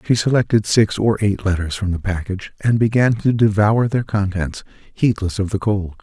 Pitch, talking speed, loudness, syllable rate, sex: 105 Hz, 190 wpm, -18 LUFS, 5.1 syllables/s, male